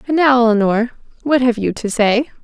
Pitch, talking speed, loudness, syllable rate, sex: 240 Hz, 195 wpm, -15 LUFS, 5.1 syllables/s, female